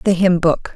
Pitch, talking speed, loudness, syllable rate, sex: 180 Hz, 240 wpm, -16 LUFS, 4.4 syllables/s, female